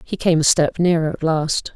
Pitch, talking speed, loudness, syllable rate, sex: 165 Hz, 240 wpm, -18 LUFS, 4.9 syllables/s, female